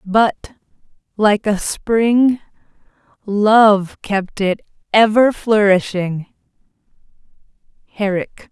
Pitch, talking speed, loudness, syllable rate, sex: 210 Hz, 70 wpm, -16 LUFS, 2.8 syllables/s, female